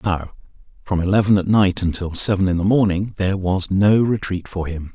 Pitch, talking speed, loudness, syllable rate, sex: 95 Hz, 195 wpm, -19 LUFS, 5.3 syllables/s, male